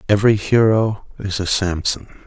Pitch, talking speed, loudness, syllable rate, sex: 100 Hz, 130 wpm, -18 LUFS, 4.9 syllables/s, male